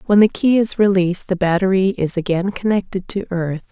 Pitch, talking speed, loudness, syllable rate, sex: 190 Hz, 195 wpm, -18 LUFS, 5.5 syllables/s, female